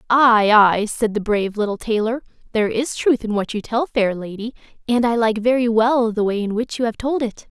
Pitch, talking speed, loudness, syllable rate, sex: 230 Hz, 230 wpm, -19 LUFS, 5.3 syllables/s, female